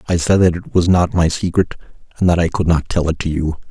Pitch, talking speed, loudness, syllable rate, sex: 85 Hz, 275 wpm, -16 LUFS, 6.1 syllables/s, male